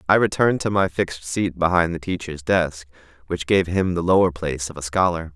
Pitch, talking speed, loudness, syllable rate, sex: 85 Hz, 215 wpm, -21 LUFS, 5.7 syllables/s, male